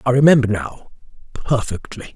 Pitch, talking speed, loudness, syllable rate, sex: 115 Hz, 85 wpm, -17 LUFS, 4.9 syllables/s, male